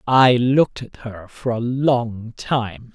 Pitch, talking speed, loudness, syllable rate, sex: 120 Hz, 165 wpm, -19 LUFS, 3.2 syllables/s, male